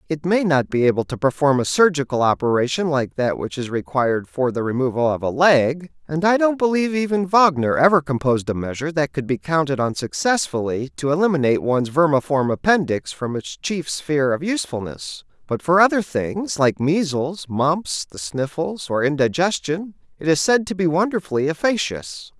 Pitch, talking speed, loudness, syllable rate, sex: 150 Hz, 175 wpm, -20 LUFS, 5.4 syllables/s, male